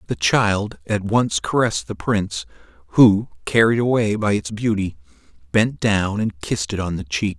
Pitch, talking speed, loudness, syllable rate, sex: 100 Hz, 170 wpm, -20 LUFS, 4.9 syllables/s, male